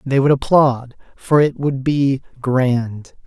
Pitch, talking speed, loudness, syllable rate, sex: 135 Hz, 145 wpm, -17 LUFS, 3.3 syllables/s, male